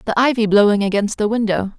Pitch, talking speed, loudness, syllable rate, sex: 210 Hz, 200 wpm, -16 LUFS, 6.3 syllables/s, female